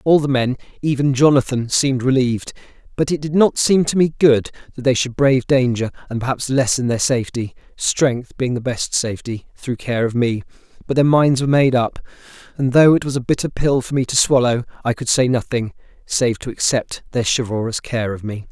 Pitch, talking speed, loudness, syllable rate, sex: 130 Hz, 200 wpm, -18 LUFS, 5.5 syllables/s, male